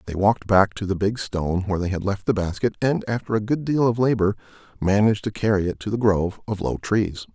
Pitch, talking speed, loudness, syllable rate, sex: 105 Hz, 245 wpm, -22 LUFS, 6.1 syllables/s, male